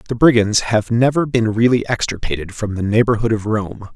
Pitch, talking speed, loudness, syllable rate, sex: 110 Hz, 180 wpm, -17 LUFS, 5.4 syllables/s, male